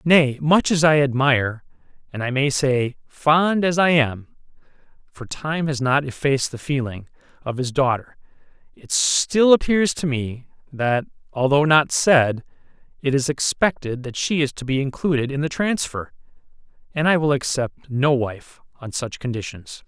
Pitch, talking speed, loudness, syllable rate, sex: 140 Hz, 160 wpm, -20 LUFS, 4.4 syllables/s, male